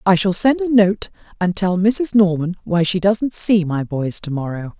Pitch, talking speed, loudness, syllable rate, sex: 190 Hz, 215 wpm, -18 LUFS, 4.4 syllables/s, female